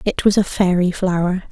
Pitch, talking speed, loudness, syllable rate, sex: 185 Hz, 200 wpm, -17 LUFS, 5.2 syllables/s, female